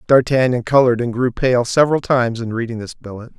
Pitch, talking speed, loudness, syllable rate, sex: 120 Hz, 195 wpm, -16 LUFS, 6.2 syllables/s, male